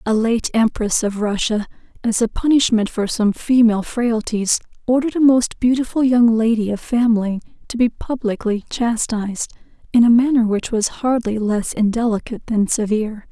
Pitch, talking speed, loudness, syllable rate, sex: 225 Hz, 155 wpm, -18 LUFS, 5.1 syllables/s, female